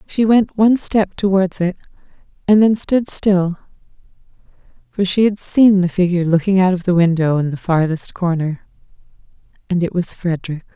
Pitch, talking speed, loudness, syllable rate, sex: 185 Hz, 160 wpm, -16 LUFS, 5.2 syllables/s, female